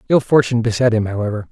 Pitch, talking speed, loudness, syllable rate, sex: 115 Hz, 200 wpm, -16 LUFS, 7.5 syllables/s, male